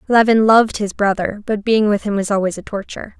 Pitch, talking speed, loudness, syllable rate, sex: 210 Hz, 225 wpm, -16 LUFS, 6.1 syllables/s, female